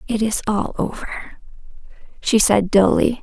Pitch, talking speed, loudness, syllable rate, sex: 210 Hz, 130 wpm, -18 LUFS, 4.1 syllables/s, female